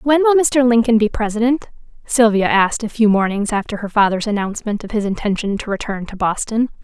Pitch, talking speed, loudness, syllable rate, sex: 220 Hz, 195 wpm, -17 LUFS, 5.8 syllables/s, female